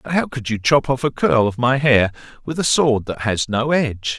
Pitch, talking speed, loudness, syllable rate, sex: 125 Hz, 260 wpm, -18 LUFS, 5.1 syllables/s, male